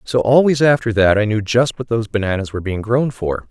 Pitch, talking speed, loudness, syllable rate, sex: 115 Hz, 240 wpm, -16 LUFS, 6.0 syllables/s, male